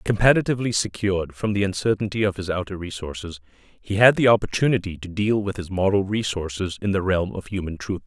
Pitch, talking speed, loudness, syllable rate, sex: 100 Hz, 185 wpm, -22 LUFS, 6.0 syllables/s, male